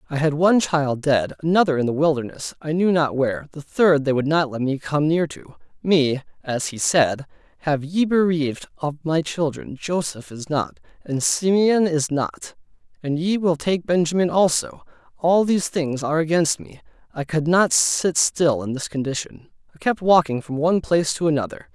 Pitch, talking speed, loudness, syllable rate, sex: 155 Hz, 190 wpm, -21 LUFS, 5.0 syllables/s, male